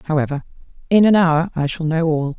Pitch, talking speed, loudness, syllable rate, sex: 160 Hz, 200 wpm, -17 LUFS, 5.4 syllables/s, female